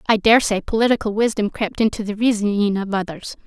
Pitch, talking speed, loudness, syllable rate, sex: 210 Hz, 175 wpm, -19 LUFS, 6.2 syllables/s, female